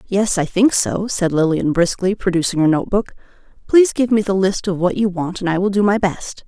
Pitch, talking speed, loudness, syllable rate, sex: 190 Hz, 230 wpm, -17 LUFS, 5.5 syllables/s, female